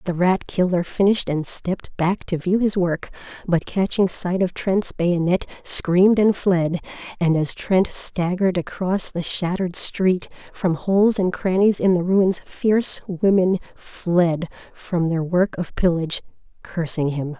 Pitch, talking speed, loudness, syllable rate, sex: 180 Hz, 155 wpm, -21 LUFS, 4.3 syllables/s, female